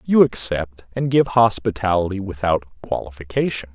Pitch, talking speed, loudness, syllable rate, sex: 100 Hz, 110 wpm, -20 LUFS, 4.8 syllables/s, male